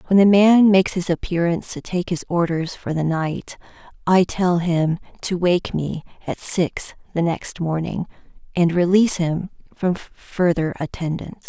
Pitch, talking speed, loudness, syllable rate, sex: 175 Hz, 155 wpm, -20 LUFS, 4.5 syllables/s, female